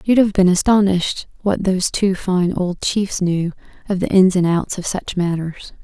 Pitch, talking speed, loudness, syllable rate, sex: 185 Hz, 195 wpm, -18 LUFS, 4.7 syllables/s, female